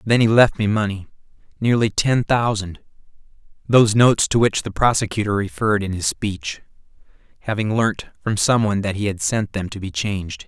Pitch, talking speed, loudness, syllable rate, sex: 105 Hz, 170 wpm, -19 LUFS, 5.5 syllables/s, male